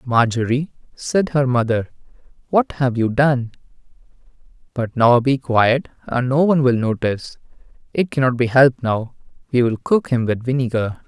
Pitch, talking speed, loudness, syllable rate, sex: 130 Hz, 140 wpm, -18 LUFS, 4.9 syllables/s, male